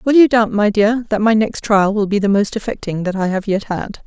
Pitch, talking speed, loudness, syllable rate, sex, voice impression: 210 Hz, 280 wpm, -16 LUFS, 5.4 syllables/s, female, feminine, adult-like, slightly intellectual, slightly kind